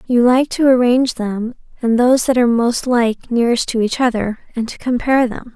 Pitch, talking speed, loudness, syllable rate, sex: 240 Hz, 205 wpm, -16 LUFS, 5.7 syllables/s, female